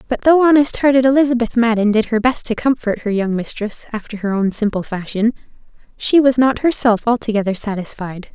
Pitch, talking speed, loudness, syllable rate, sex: 230 Hz, 180 wpm, -16 LUFS, 5.7 syllables/s, female